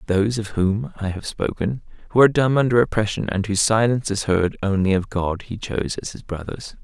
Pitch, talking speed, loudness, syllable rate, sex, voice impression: 105 Hz, 210 wpm, -21 LUFS, 5.9 syllables/s, male, masculine, adult-like, tensed, powerful, weak, slightly dark, slightly muffled, cool, intellectual, calm, reassuring, slightly wild, kind, modest